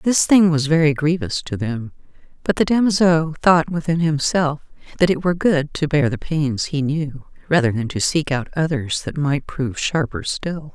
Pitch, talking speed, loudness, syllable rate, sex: 150 Hz, 190 wpm, -19 LUFS, 4.7 syllables/s, female